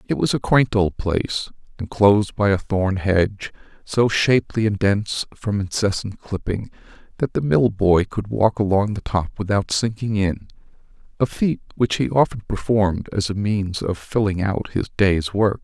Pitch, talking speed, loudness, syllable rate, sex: 100 Hz, 170 wpm, -21 LUFS, 4.6 syllables/s, male